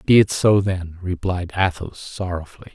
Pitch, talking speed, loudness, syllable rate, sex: 90 Hz, 155 wpm, -21 LUFS, 4.6 syllables/s, male